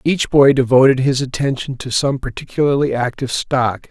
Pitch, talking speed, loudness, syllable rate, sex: 130 Hz, 155 wpm, -16 LUFS, 5.3 syllables/s, male